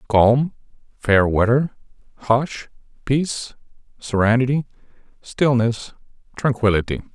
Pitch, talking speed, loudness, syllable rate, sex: 120 Hz, 65 wpm, -20 LUFS, 4.1 syllables/s, male